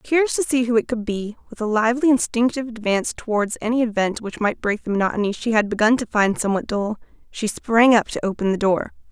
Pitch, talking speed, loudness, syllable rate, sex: 225 Hz, 225 wpm, -20 LUFS, 6.2 syllables/s, female